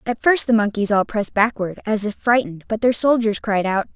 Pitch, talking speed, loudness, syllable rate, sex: 215 Hz, 225 wpm, -19 LUFS, 5.7 syllables/s, female